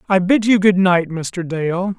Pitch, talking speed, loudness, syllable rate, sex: 185 Hz, 210 wpm, -16 LUFS, 3.9 syllables/s, male